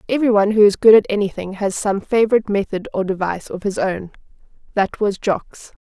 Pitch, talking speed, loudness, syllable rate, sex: 200 Hz, 195 wpm, -18 LUFS, 6.1 syllables/s, female